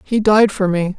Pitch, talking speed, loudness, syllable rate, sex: 200 Hz, 245 wpm, -15 LUFS, 4.5 syllables/s, female